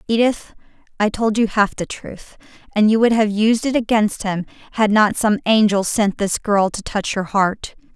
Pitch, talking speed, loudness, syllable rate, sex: 210 Hz, 195 wpm, -18 LUFS, 4.5 syllables/s, female